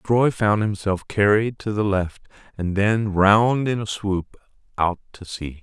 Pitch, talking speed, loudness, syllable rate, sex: 100 Hz, 170 wpm, -21 LUFS, 3.8 syllables/s, male